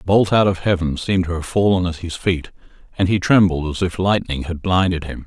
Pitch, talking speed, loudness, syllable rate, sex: 90 Hz, 240 wpm, -19 LUFS, 5.7 syllables/s, male